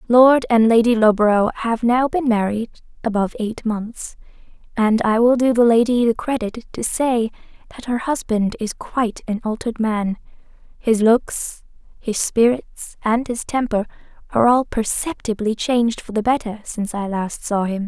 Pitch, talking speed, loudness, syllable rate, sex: 230 Hz, 160 wpm, -19 LUFS, 4.7 syllables/s, female